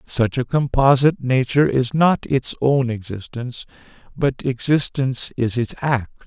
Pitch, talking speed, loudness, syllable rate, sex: 130 Hz, 135 wpm, -19 LUFS, 4.7 syllables/s, male